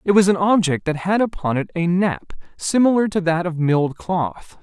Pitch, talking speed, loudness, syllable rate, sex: 175 Hz, 205 wpm, -19 LUFS, 5.0 syllables/s, male